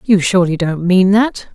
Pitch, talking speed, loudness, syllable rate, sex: 190 Hz, 195 wpm, -13 LUFS, 5.0 syllables/s, female